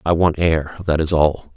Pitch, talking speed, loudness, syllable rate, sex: 80 Hz, 230 wpm, -18 LUFS, 4.5 syllables/s, male